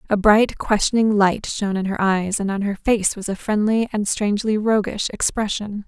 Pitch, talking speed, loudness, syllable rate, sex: 205 Hz, 195 wpm, -20 LUFS, 5.1 syllables/s, female